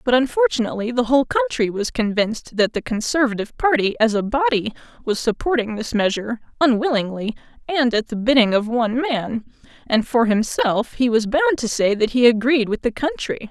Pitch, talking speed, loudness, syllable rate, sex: 245 Hz, 175 wpm, -19 LUFS, 5.6 syllables/s, female